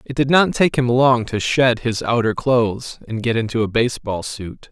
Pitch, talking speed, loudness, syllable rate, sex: 120 Hz, 215 wpm, -18 LUFS, 4.9 syllables/s, male